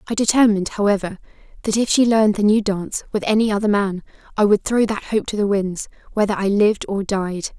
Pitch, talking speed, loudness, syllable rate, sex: 205 Hz, 215 wpm, -19 LUFS, 6.1 syllables/s, female